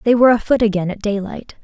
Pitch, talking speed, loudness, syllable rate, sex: 215 Hz, 220 wpm, -16 LUFS, 6.8 syllables/s, female